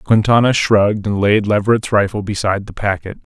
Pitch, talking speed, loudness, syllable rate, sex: 105 Hz, 160 wpm, -15 LUFS, 5.7 syllables/s, male